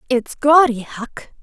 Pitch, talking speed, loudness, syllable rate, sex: 260 Hz, 125 wpm, -15 LUFS, 3.5 syllables/s, female